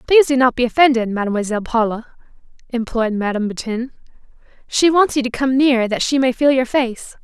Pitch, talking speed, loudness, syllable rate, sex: 245 Hz, 185 wpm, -17 LUFS, 6.3 syllables/s, female